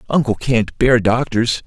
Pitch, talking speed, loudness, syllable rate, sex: 120 Hz, 145 wpm, -16 LUFS, 4.1 syllables/s, male